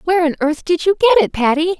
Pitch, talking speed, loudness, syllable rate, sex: 330 Hz, 270 wpm, -15 LUFS, 7.0 syllables/s, female